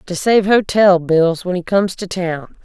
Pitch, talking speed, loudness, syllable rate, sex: 185 Hz, 205 wpm, -15 LUFS, 4.4 syllables/s, female